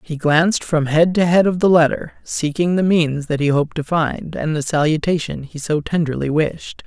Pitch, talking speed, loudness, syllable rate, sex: 160 Hz, 210 wpm, -18 LUFS, 5.0 syllables/s, male